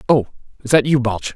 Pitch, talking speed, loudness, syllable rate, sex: 125 Hz, 220 wpm, -17 LUFS, 5.4 syllables/s, male